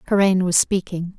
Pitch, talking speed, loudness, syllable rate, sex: 185 Hz, 150 wpm, -18 LUFS, 4.7 syllables/s, female